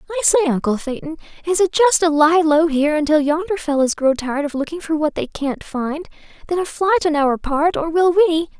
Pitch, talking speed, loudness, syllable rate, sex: 315 Hz, 225 wpm, -18 LUFS, 6.0 syllables/s, female